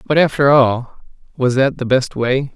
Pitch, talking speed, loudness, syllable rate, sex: 130 Hz, 190 wpm, -15 LUFS, 4.4 syllables/s, male